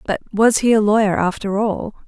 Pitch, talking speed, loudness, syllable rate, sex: 210 Hz, 200 wpm, -17 LUFS, 4.9 syllables/s, female